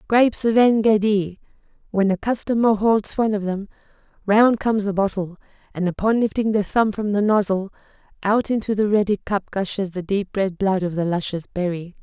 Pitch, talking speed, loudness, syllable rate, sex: 205 Hz, 185 wpm, -20 LUFS, 5.3 syllables/s, female